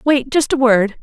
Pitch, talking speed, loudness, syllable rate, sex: 255 Hz, 175 wpm, -15 LUFS, 4.4 syllables/s, female